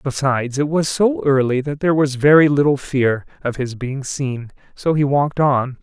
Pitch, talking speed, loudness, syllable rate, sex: 135 Hz, 195 wpm, -18 LUFS, 4.9 syllables/s, male